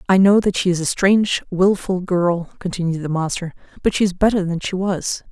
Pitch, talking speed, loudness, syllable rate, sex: 185 Hz, 215 wpm, -19 LUFS, 5.4 syllables/s, female